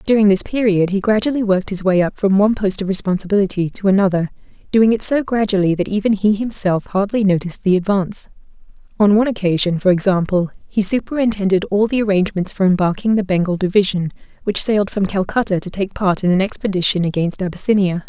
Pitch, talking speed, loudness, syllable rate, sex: 195 Hz, 185 wpm, -17 LUFS, 6.3 syllables/s, female